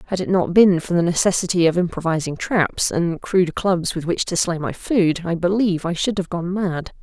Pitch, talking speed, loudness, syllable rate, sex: 175 Hz, 220 wpm, -20 LUFS, 5.2 syllables/s, female